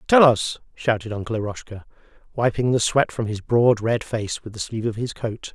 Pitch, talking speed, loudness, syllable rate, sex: 115 Hz, 205 wpm, -22 LUFS, 5.2 syllables/s, male